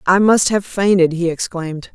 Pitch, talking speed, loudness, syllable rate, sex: 180 Hz, 185 wpm, -16 LUFS, 5.0 syllables/s, female